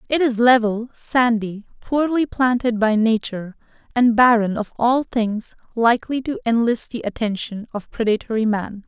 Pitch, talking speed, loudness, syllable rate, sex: 230 Hz, 140 wpm, -19 LUFS, 4.6 syllables/s, female